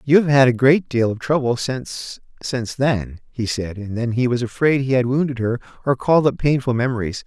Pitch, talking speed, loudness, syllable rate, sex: 125 Hz, 205 wpm, -19 LUFS, 5.5 syllables/s, male